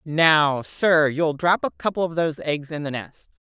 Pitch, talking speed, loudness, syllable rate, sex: 155 Hz, 210 wpm, -21 LUFS, 4.4 syllables/s, female